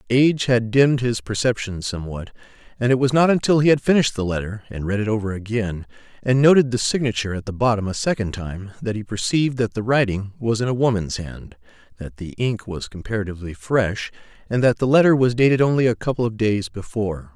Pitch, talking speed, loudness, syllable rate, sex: 115 Hz, 205 wpm, -20 LUFS, 6.1 syllables/s, male